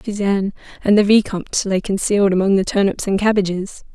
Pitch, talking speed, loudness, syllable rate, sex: 200 Hz, 165 wpm, -17 LUFS, 6.1 syllables/s, female